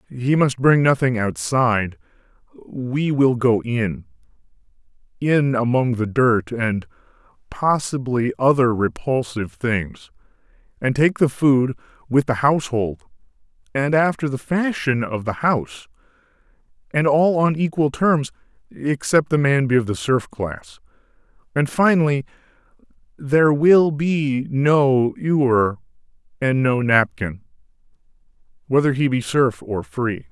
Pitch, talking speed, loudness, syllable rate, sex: 130 Hz, 115 wpm, -19 LUFS, 4.1 syllables/s, male